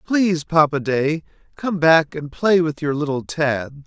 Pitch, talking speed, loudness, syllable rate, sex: 155 Hz, 170 wpm, -19 LUFS, 4.1 syllables/s, male